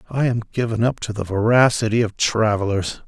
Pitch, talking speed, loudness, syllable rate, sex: 110 Hz, 175 wpm, -20 LUFS, 5.3 syllables/s, male